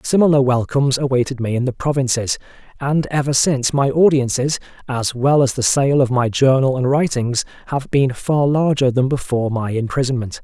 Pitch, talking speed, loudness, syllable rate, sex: 130 Hz, 170 wpm, -17 LUFS, 5.3 syllables/s, male